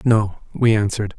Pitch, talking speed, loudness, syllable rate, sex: 105 Hz, 150 wpm, -19 LUFS, 5.6 syllables/s, male